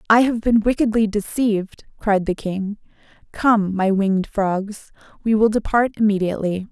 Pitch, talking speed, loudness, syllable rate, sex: 210 Hz, 145 wpm, -19 LUFS, 4.7 syllables/s, female